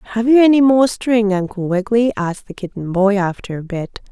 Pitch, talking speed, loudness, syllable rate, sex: 210 Hz, 205 wpm, -16 LUFS, 5.3 syllables/s, female